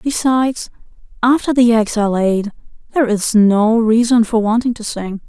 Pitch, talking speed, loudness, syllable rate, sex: 225 Hz, 160 wpm, -15 LUFS, 5.0 syllables/s, female